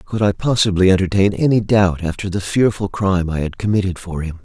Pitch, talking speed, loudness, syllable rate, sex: 95 Hz, 205 wpm, -17 LUFS, 5.8 syllables/s, male